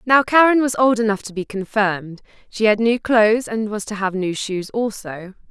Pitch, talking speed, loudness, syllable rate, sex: 215 Hz, 205 wpm, -18 LUFS, 5.1 syllables/s, female